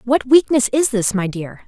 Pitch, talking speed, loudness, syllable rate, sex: 235 Hz, 215 wpm, -16 LUFS, 4.6 syllables/s, female